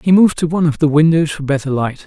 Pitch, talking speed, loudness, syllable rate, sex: 155 Hz, 290 wpm, -14 LUFS, 7.1 syllables/s, male